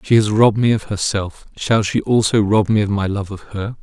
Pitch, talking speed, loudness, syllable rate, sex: 105 Hz, 250 wpm, -17 LUFS, 5.3 syllables/s, male